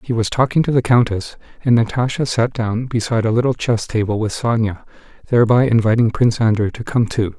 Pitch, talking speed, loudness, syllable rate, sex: 115 Hz, 195 wpm, -17 LUFS, 5.9 syllables/s, male